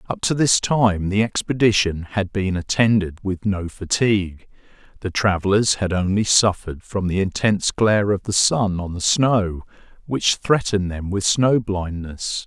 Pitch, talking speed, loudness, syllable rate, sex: 100 Hz, 160 wpm, -20 LUFS, 4.5 syllables/s, male